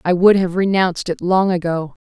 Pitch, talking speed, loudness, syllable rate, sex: 180 Hz, 205 wpm, -17 LUFS, 5.3 syllables/s, female